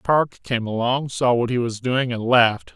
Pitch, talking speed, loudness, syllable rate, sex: 125 Hz, 220 wpm, -20 LUFS, 4.6 syllables/s, male